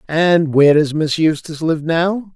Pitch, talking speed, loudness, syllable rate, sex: 160 Hz, 180 wpm, -15 LUFS, 4.6 syllables/s, male